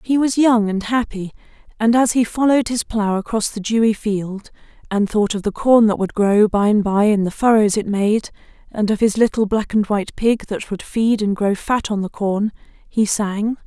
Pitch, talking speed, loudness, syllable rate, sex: 215 Hz, 220 wpm, -18 LUFS, 4.9 syllables/s, female